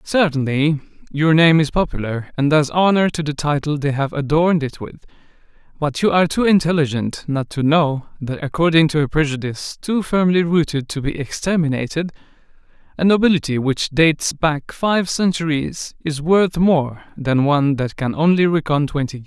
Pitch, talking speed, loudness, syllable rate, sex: 155 Hz, 165 wpm, -18 LUFS, 5.1 syllables/s, male